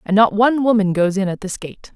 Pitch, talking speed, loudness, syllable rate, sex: 205 Hz, 275 wpm, -17 LUFS, 6.0 syllables/s, female